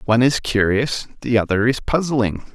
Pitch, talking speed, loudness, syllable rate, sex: 120 Hz, 165 wpm, -19 LUFS, 5.0 syllables/s, male